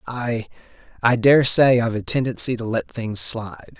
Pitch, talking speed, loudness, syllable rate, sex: 115 Hz, 160 wpm, -19 LUFS, 4.9 syllables/s, male